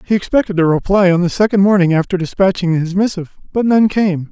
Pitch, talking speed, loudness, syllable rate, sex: 185 Hz, 210 wpm, -14 LUFS, 6.2 syllables/s, male